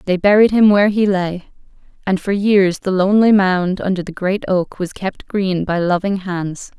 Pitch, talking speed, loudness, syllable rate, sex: 190 Hz, 195 wpm, -16 LUFS, 4.7 syllables/s, female